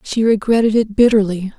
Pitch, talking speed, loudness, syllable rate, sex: 215 Hz, 150 wpm, -15 LUFS, 5.6 syllables/s, female